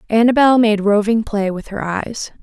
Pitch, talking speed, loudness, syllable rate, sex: 215 Hz, 175 wpm, -16 LUFS, 4.6 syllables/s, female